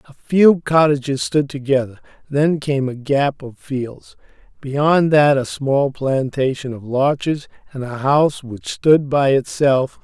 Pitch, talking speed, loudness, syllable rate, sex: 140 Hz, 150 wpm, -17 LUFS, 3.9 syllables/s, male